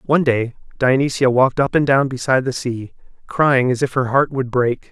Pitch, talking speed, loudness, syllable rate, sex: 130 Hz, 205 wpm, -17 LUFS, 5.3 syllables/s, male